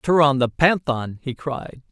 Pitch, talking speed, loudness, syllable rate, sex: 140 Hz, 155 wpm, -21 LUFS, 3.9 syllables/s, male